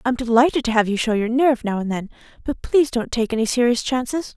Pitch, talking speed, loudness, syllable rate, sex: 240 Hz, 260 wpm, -20 LUFS, 6.7 syllables/s, female